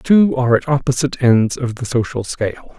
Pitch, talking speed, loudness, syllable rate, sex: 130 Hz, 215 wpm, -17 LUFS, 5.8 syllables/s, male